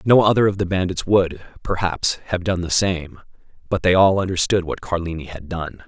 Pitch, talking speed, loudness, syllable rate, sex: 90 Hz, 195 wpm, -20 LUFS, 5.0 syllables/s, male